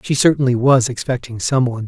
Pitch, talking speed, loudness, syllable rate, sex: 125 Hz, 195 wpm, -17 LUFS, 6.2 syllables/s, male